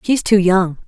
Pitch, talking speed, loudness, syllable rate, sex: 195 Hz, 205 wpm, -14 LUFS, 4.2 syllables/s, female